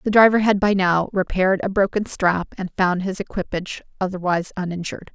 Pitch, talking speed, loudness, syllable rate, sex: 190 Hz, 175 wpm, -21 LUFS, 6.1 syllables/s, female